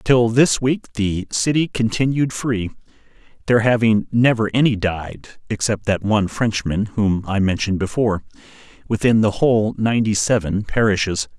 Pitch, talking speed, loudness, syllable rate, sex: 110 Hz, 135 wpm, -19 LUFS, 4.9 syllables/s, male